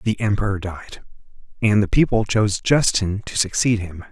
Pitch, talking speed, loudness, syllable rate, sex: 105 Hz, 160 wpm, -20 LUFS, 5.1 syllables/s, male